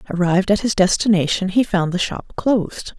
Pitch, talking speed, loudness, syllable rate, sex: 195 Hz, 180 wpm, -18 LUFS, 5.4 syllables/s, female